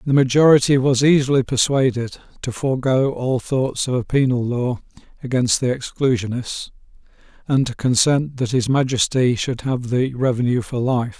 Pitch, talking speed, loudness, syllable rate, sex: 130 Hz, 150 wpm, -19 LUFS, 4.9 syllables/s, male